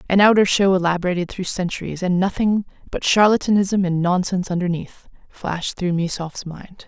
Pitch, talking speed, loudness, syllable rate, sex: 185 Hz, 150 wpm, -19 LUFS, 5.4 syllables/s, female